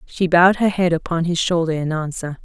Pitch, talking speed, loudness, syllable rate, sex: 170 Hz, 220 wpm, -18 LUFS, 5.7 syllables/s, female